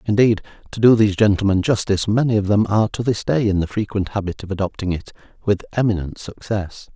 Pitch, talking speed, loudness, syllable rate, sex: 105 Hz, 200 wpm, -19 LUFS, 6.3 syllables/s, male